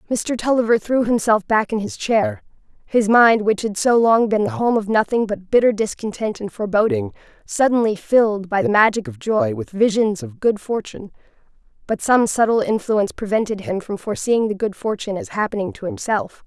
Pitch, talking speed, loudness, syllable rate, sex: 220 Hz, 185 wpm, -19 LUFS, 5.4 syllables/s, female